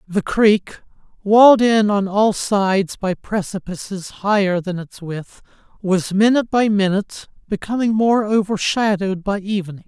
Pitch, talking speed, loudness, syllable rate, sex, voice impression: 200 Hz, 135 wpm, -18 LUFS, 4.6 syllables/s, male, slightly feminine, very adult-like, slightly muffled, slightly friendly, unique